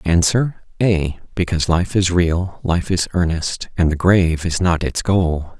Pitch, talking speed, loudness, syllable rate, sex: 90 Hz, 170 wpm, -18 LUFS, 4.2 syllables/s, male